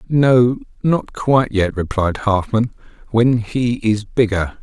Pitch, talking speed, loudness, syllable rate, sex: 115 Hz, 130 wpm, -17 LUFS, 3.6 syllables/s, male